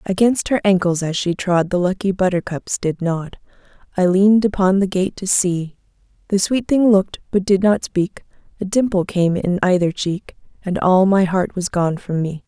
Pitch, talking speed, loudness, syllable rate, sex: 190 Hz, 190 wpm, -18 LUFS, 4.9 syllables/s, female